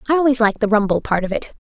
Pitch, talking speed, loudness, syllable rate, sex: 225 Hz, 295 wpm, -18 LUFS, 7.3 syllables/s, female